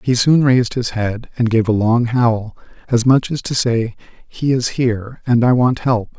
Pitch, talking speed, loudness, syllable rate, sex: 120 Hz, 215 wpm, -16 LUFS, 4.6 syllables/s, male